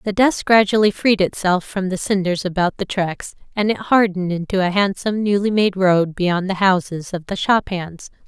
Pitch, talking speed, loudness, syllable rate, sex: 190 Hz, 195 wpm, -18 LUFS, 5.0 syllables/s, female